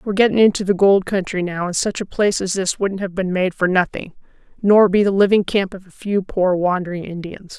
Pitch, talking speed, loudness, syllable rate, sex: 190 Hz, 235 wpm, -18 LUFS, 5.7 syllables/s, female